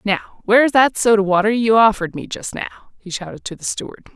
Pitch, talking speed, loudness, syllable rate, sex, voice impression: 210 Hz, 215 wpm, -17 LUFS, 6.4 syllables/s, female, feminine, adult-like, slightly powerful, slightly friendly, slightly unique, slightly intense